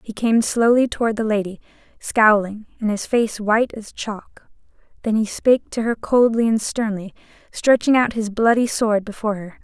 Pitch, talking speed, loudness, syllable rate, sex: 220 Hz, 175 wpm, -19 LUFS, 5.0 syllables/s, female